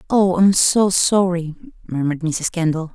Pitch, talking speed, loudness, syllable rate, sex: 180 Hz, 145 wpm, -17 LUFS, 4.6 syllables/s, female